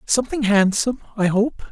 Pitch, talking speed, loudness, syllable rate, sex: 220 Hz, 140 wpm, -19 LUFS, 5.7 syllables/s, male